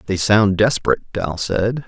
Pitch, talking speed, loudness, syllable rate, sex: 105 Hz, 160 wpm, -18 LUFS, 4.7 syllables/s, male